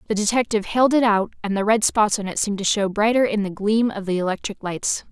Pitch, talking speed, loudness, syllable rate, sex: 210 Hz, 260 wpm, -21 LUFS, 6.1 syllables/s, female